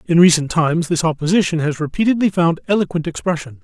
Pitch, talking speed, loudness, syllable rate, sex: 165 Hz, 165 wpm, -17 LUFS, 6.5 syllables/s, male